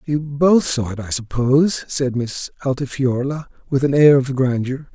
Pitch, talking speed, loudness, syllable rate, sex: 135 Hz, 170 wpm, -18 LUFS, 4.5 syllables/s, male